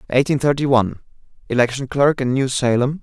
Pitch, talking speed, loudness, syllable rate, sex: 130 Hz, 140 wpm, -18 LUFS, 6.2 syllables/s, male